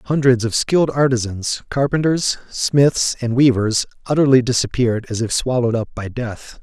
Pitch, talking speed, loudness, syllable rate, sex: 125 Hz, 125 wpm, -18 LUFS, 5.1 syllables/s, male